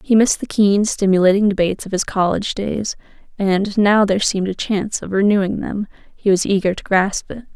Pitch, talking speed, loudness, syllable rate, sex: 200 Hz, 200 wpm, -17 LUFS, 5.8 syllables/s, female